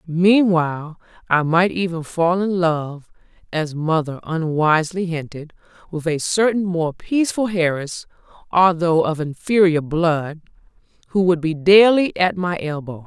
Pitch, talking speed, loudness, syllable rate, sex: 170 Hz, 130 wpm, -19 LUFS, 3.7 syllables/s, female